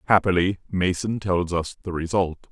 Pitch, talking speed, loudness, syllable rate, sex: 90 Hz, 145 wpm, -24 LUFS, 4.7 syllables/s, male